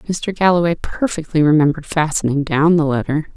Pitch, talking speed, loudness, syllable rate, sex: 160 Hz, 145 wpm, -17 LUFS, 5.5 syllables/s, female